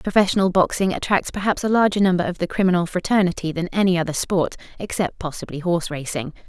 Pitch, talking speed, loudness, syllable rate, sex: 180 Hz, 175 wpm, -21 LUFS, 6.4 syllables/s, female